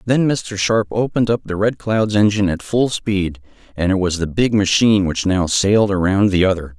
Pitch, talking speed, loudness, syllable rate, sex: 100 Hz, 210 wpm, -17 LUFS, 5.3 syllables/s, male